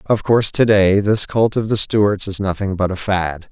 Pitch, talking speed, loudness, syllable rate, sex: 100 Hz, 240 wpm, -16 LUFS, 4.7 syllables/s, male